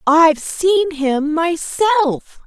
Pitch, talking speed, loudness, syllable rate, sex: 325 Hz, 95 wpm, -16 LUFS, 2.6 syllables/s, female